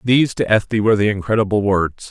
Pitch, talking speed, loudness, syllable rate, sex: 105 Hz, 200 wpm, -17 LUFS, 6.5 syllables/s, male